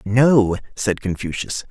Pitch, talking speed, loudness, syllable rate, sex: 110 Hz, 105 wpm, -19 LUFS, 3.6 syllables/s, male